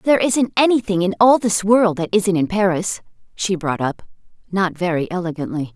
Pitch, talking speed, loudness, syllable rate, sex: 190 Hz, 175 wpm, -18 LUFS, 5.2 syllables/s, female